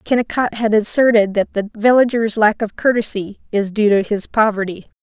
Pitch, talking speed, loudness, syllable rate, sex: 215 Hz, 165 wpm, -16 LUFS, 5.2 syllables/s, female